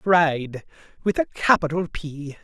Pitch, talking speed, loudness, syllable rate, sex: 160 Hz, 100 wpm, -23 LUFS, 4.1 syllables/s, male